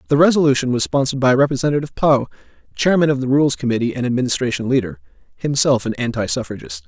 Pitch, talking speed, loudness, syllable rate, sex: 135 Hz, 165 wpm, -18 LUFS, 7.0 syllables/s, male